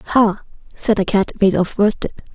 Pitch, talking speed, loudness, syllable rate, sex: 205 Hz, 180 wpm, -17 LUFS, 4.4 syllables/s, female